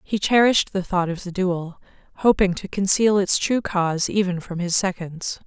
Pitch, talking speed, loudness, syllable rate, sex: 190 Hz, 185 wpm, -21 LUFS, 4.9 syllables/s, female